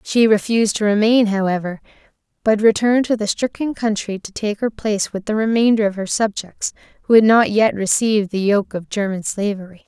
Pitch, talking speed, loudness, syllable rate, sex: 210 Hz, 190 wpm, -18 LUFS, 5.6 syllables/s, female